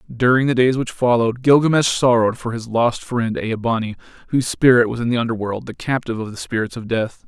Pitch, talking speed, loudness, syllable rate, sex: 120 Hz, 215 wpm, -18 LUFS, 6.1 syllables/s, male